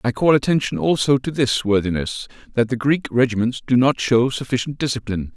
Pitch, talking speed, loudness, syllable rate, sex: 125 Hz, 180 wpm, -19 LUFS, 5.7 syllables/s, male